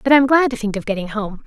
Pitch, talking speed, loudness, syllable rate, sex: 230 Hz, 330 wpm, -18 LUFS, 6.3 syllables/s, female